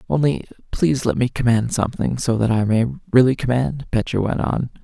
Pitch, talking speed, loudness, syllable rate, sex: 120 Hz, 185 wpm, -20 LUFS, 5.4 syllables/s, male